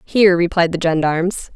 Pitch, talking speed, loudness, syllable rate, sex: 175 Hz, 155 wpm, -16 LUFS, 5.7 syllables/s, female